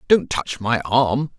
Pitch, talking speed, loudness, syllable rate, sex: 125 Hz, 175 wpm, -20 LUFS, 3.4 syllables/s, male